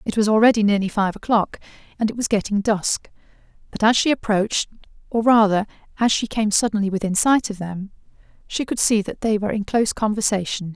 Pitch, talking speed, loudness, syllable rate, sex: 210 Hz, 190 wpm, -20 LUFS, 6.0 syllables/s, female